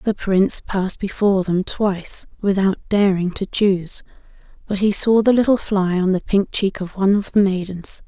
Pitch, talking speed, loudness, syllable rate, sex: 195 Hz, 185 wpm, -19 LUFS, 5.1 syllables/s, female